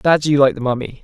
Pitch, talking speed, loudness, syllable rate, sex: 135 Hz, 290 wpm, -16 LUFS, 6.1 syllables/s, male